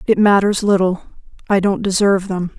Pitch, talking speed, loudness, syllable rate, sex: 195 Hz, 160 wpm, -16 LUFS, 5.6 syllables/s, female